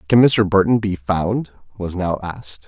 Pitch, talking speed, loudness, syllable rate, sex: 95 Hz, 180 wpm, -18 LUFS, 4.6 syllables/s, male